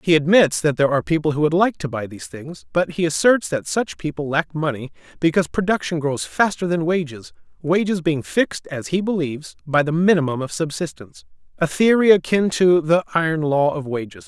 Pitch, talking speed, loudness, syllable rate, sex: 155 Hz, 195 wpm, -19 LUFS, 5.7 syllables/s, male